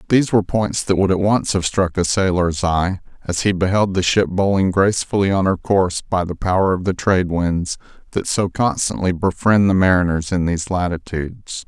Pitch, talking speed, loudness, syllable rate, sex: 95 Hz, 195 wpm, -18 LUFS, 5.4 syllables/s, male